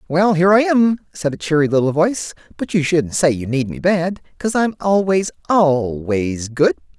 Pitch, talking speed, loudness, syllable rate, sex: 160 Hz, 190 wpm, -17 LUFS, 5.0 syllables/s, male